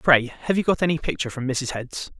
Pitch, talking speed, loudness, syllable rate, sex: 140 Hz, 245 wpm, -23 LUFS, 5.7 syllables/s, male